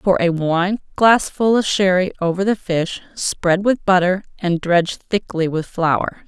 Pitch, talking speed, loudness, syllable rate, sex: 185 Hz, 155 wpm, -18 LUFS, 4.1 syllables/s, female